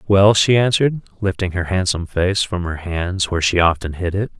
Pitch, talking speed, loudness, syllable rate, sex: 95 Hz, 205 wpm, -18 LUFS, 5.5 syllables/s, male